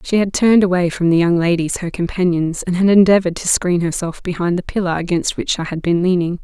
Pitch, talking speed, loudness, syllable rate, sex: 175 Hz, 235 wpm, -16 LUFS, 6.0 syllables/s, female